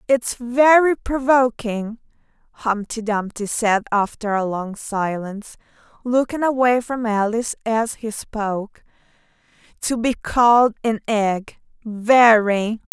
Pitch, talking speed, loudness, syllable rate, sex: 225 Hz, 100 wpm, -19 LUFS, 3.8 syllables/s, female